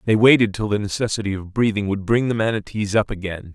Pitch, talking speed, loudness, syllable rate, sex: 105 Hz, 220 wpm, -20 LUFS, 6.2 syllables/s, male